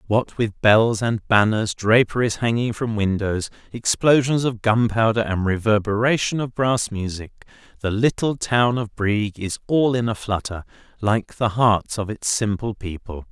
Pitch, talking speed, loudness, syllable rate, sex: 110 Hz, 155 wpm, -21 LUFS, 4.3 syllables/s, male